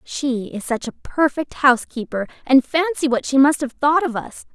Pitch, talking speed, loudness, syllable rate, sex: 270 Hz, 200 wpm, -19 LUFS, 4.9 syllables/s, female